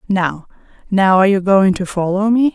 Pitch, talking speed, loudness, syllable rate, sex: 195 Hz, 190 wpm, -15 LUFS, 5.1 syllables/s, female